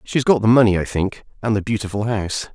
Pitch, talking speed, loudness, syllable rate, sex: 110 Hz, 235 wpm, -19 LUFS, 6.8 syllables/s, male